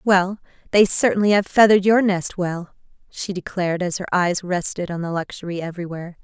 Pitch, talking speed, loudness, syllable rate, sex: 185 Hz, 175 wpm, -20 LUFS, 5.8 syllables/s, female